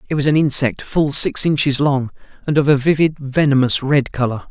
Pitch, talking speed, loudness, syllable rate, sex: 140 Hz, 200 wpm, -16 LUFS, 5.3 syllables/s, male